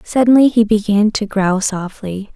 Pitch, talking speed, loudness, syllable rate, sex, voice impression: 210 Hz, 155 wpm, -14 LUFS, 4.5 syllables/s, female, feminine, young, slightly relaxed, powerful, bright, soft, slightly fluent, raspy, cute, refreshing, friendly, lively, slightly kind